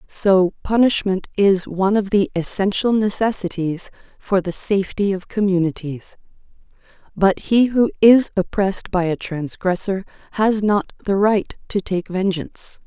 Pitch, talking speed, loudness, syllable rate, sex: 195 Hz, 130 wpm, -19 LUFS, 4.5 syllables/s, female